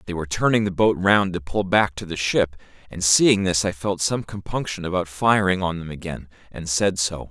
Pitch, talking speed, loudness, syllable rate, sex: 90 Hz, 220 wpm, -21 LUFS, 5.2 syllables/s, male